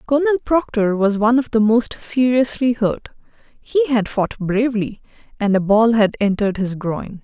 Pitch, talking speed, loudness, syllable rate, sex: 225 Hz, 165 wpm, -18 LUFS, 5.1 syllables/s, female